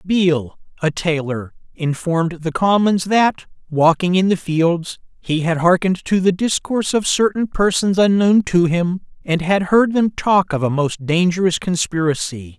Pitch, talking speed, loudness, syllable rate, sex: 180 Hz, 155 wpm, -17 LUFS, 4.5 syllables/s, male